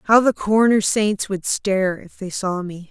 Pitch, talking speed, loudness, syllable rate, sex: 200 Hz, 205 wpm, -19 LUFS, 4.2 syllables/s, female